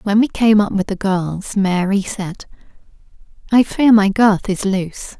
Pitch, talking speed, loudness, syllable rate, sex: 200 Hz, 175 wpm, -16 LUFS, 4.2 syllables/s, female